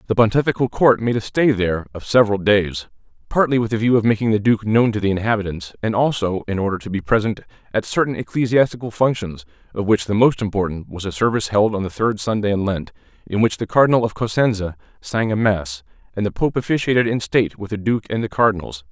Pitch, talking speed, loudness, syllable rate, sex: 105 Hz, 220 wpm, -19 LUFS, 6.2 syllables/s, male